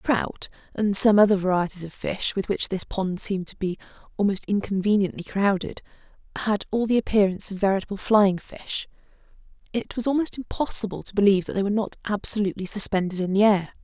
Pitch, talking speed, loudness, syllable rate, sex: 200 Hz, 180 wpm, -24 LUFS, 6.1 syllables/s, female